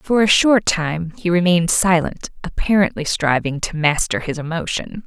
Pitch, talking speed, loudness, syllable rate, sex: 175 Hz, 155 wpm, -18 LUFS, 4.7 syllables/s, female